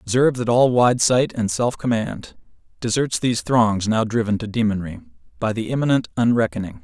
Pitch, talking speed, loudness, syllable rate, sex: 115 Hz, 165 wpm, -20 LUFS, 5.2 syllables/s, male